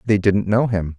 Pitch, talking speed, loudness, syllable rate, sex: 100 Hz, 245 wpm, -18 LUFS, 4.5 syllables/s, male